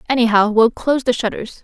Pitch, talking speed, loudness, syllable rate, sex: 235 Hz, 185 wpm, -16 LUFS, 6.2 syllables/s, female